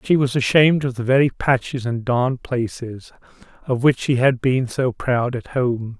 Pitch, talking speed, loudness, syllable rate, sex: 125 Hz, 190 wpm, -19 LUFS, 4.7 syllables/s, male